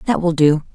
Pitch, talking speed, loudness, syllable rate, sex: 165 Hz, 240 wpm, -16 LUFS, 4.7 syllables/s, female